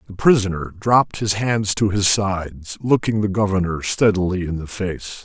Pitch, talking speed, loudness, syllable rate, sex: 100 Hz, 170 wpm, -19 LUFS, 5.0 syllables/s, male